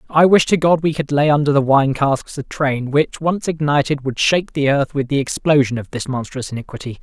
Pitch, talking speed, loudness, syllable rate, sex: 140 Hz, 230 wpm, -17 LUFS, 5.5 syllables/s, male